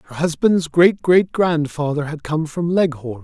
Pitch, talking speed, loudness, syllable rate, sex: 160 Hz, 165 wpm, -18 LUFS, 4.3 syllables/s, male